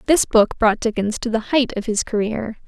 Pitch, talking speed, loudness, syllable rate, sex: 225 Hz, 225 wpm, -19 LUFS, 5.0 syllables/s, female